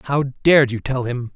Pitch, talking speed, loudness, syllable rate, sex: 130 Hz, 220 wpm, -18 LUFS, 5.0 syllables/s, male